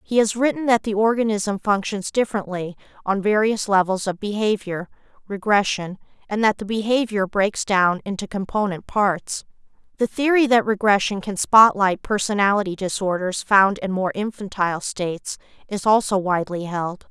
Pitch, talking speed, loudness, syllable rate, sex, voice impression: 205 Hz, 140 wpm, -21 LUFS, 5.0 syllables/s, female, feminine, adult-like, tensed, bright, clear, fluent, intellectual, calm, slightly friendly, slightly strict, slightly sharp, light